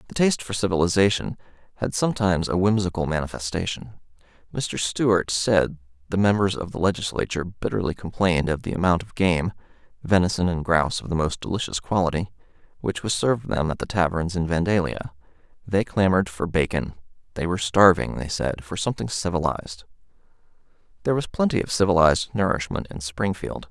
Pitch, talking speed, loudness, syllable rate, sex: 90 Hz, 150 wpm, -23 LUFS, 6.0 syllables/s, male